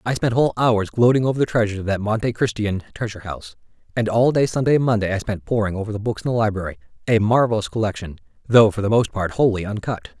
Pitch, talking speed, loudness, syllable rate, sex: 110 Hz, 230 wpm, -20 LUFS, 6.9 syllables/s, male